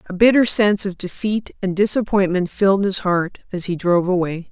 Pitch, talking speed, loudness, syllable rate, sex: 190 Hz, 185 wpm, -18 LUFS, 5.4 syllables/s, female